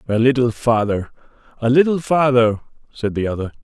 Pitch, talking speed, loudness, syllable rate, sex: 120 Hz, 130 wpm, -18 LUFS, 5.3 syllables/s, male